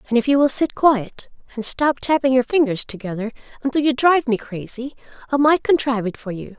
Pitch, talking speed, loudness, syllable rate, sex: 255 Hz, 210 wpm, -19 LUFS, 5.8 syllables/s, female